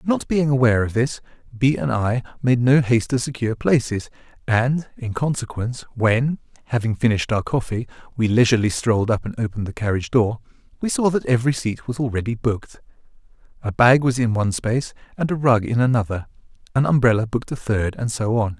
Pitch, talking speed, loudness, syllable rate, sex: 120 Hz, 185 wpm, -21 LUFS, 6.1 syllables/s, male